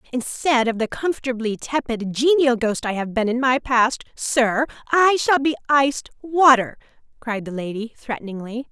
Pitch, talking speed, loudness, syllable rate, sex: 250 Hz, 160 wpm, -20 LUFS, 4.7 syllables/s, female